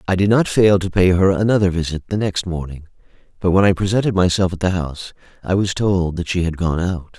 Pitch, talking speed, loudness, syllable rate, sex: 90 Hz, 235 wpm, -18 LUFS, 5.9 syllables/s, male